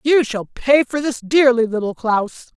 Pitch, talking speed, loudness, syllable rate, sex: 250 Hz, 185 wpm, -17 LUFS, 4.2 syllables/s, female